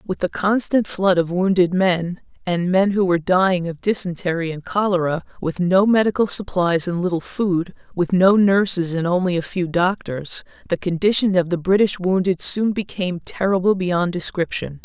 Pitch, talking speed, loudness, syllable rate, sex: 185 Hz, 170 wpm, -19 LUFS, 4.9 syllables/s, female